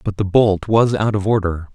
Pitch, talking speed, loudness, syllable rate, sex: 100 Hz, 240 wpm, -17 LUFS, 5.0 syllables/s, male